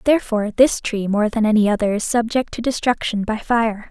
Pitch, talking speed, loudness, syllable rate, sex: 225 Hz, 200 wpm, -19 LUFS, 5.5 syllables/s, female